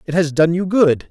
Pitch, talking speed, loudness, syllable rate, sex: 170 Hz, 270 wpm, -16 LUFS, 5.2 syllables/s, male